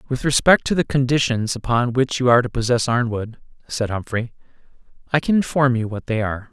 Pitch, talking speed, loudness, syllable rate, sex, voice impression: 125 Hz, 195 wpm, -19 LUFS, 5.8 syllables/s, male, masculine, adult-like, slightly tensed, slightly powerful, slightly bright, slightly fluent, cool, intellectual, slightly refreshing, sincere, slightly calm